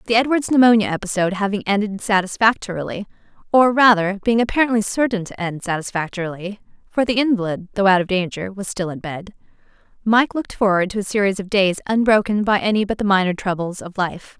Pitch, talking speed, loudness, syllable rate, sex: 200 Hz, 180 wpm, -19 LUFS, 3.8 syllables/s, female